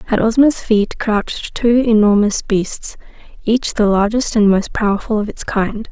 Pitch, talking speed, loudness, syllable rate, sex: 215 Hz, 160 wpm, -15 LUFS, 4.4 syllables/s, female